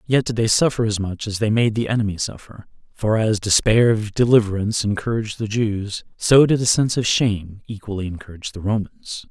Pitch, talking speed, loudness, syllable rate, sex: 110 Hz, 195 wpm, -19 LUFS, 5.7 syllables/s, male